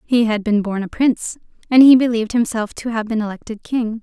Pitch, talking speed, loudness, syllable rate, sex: 225 Hz, 225 wpm, -17 LUFS, 5.9 syllables/s, female